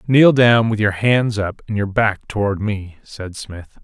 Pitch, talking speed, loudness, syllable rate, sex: 105 Hz, 205 wpm, -17 LUFS, 3.9 syllables/s, male